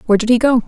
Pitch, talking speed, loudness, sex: 235 Hz, 360 wpm, -14 LUFS, female